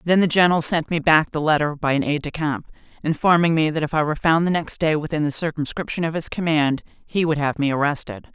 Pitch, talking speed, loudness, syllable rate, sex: 155 Hz, 245 wpm, -21 LUFS, 6.1 syllables/s, female